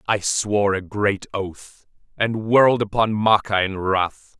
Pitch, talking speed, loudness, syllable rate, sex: 105 Hz, 150 wpm, -20 LUFS, 3.9 syllables/s, male